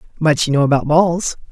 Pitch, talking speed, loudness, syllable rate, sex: 155 Hz, 200 wpm, -15 LUFS, 6.0 syllables/s, male